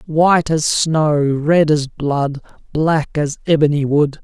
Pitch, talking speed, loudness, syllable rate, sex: 150 Hz, 140 wpm, -16 LUFS, 3.5 syllables/s, male